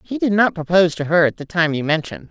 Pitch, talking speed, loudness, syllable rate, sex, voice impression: 175 Hz, 285 wpm, -18 LUFS, 6.6 syllables/s, female, slightly masculine, slightly feminine, very gender-neutral, slightly young, slightly adult-like, slightly thick, tensed, powerful, bright, hard, slightly clear, fluent, slightly raspy, slightly cool, intellectual, refreshing, sincere, slightly calm, slightly friendly, slightly reassuring, very unique, slightly elegant, wild, very lively, kind, intense, slightly sharp